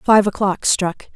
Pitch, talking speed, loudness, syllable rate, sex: 200 Hz, 155 wpm, -18 LUFS, 3.6 syllables/s, female